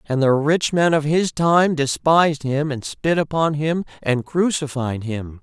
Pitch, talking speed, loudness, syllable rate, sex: 150 Hz, 175 wpm, -19 LUFS, 4.1 syllables/s, male